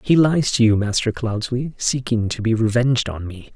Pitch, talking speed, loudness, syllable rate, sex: 115 Hz, 205 wpm, -19 LUFS, 5.3 syllables/s, male